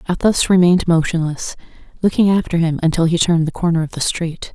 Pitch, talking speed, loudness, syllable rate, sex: 170 Hz, 185 wpm, -16 LUFS, 6.2 syllables/s, female